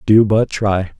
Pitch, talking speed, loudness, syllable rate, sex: 105 Hz, 180 wpm, -15 LUFS, 4.0 syllables/s, male